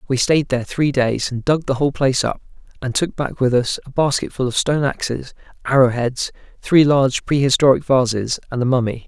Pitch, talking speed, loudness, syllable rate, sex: 130 Hz, 205 wpm, -18 LUFS, 5.7 syllables/s, male